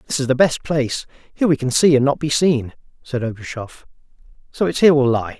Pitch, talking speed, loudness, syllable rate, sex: 135 Hz, 220 wpm, -18 LUFS, 6.1 syllables/s, male